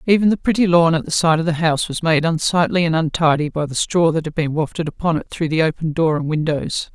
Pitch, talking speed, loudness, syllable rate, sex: 160 Hz, 260 wpm, -18 LUFS, 6.0 syllables/s, female